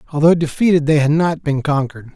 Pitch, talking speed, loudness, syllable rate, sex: 150 Hz, 195 wpm, -16 LUFS, 6.5 syllables/s, male